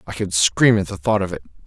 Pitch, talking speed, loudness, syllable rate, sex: 95 Hz, 290 wpm, -18 LUFS, 6.0 syllables/s, male